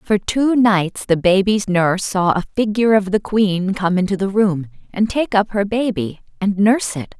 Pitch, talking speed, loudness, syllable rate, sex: 200 Hz, 200 wpm, -17 LUFS, 4.6 syllables/s, female